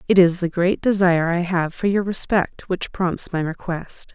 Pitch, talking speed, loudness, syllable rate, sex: 180 Hz, 205 wpm, -20 LUFS, 4.5 syllables/s, female